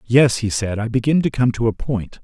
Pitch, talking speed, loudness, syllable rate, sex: 120 Hz, 270 wpm, -19 LUFS, 5.2 syllables/s, male